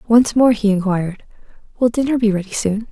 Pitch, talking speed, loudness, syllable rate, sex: 215 Hz, 185 wpm, -17 LUFS, 5.9 syllables/s, female